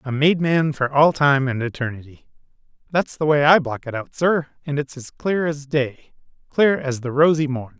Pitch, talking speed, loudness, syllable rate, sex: 145 Hz, 190 wpm, -20 LUFS, 4.9 syllables/s, male